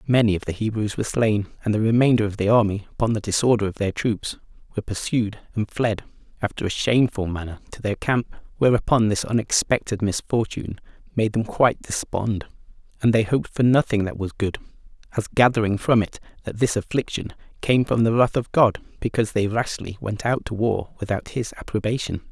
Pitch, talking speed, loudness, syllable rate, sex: 110 Hz, 185 wpm, -22 LUFS, 5.7 syllables/s, male